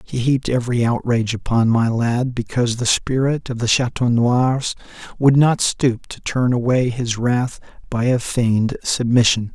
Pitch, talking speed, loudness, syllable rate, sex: 120 Hz, 165 wpm, -18 LUFS, 4.6 syllables/s, male